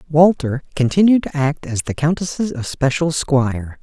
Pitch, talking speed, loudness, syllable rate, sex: 150 Hz, 140 wpm, -18 LUFS, 4.6 syllables/s, male